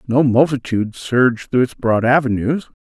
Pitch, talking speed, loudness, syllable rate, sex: 125 Hz, 150 wpm, -17 LUFS, 5.0 syllables/s, male